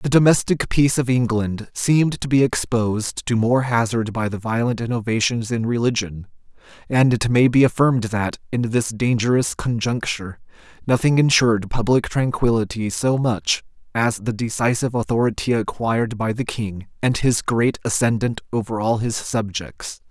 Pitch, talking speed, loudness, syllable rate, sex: 115 Hz, 150 wpm, -20 LUFS, 5.0 syllables/s, male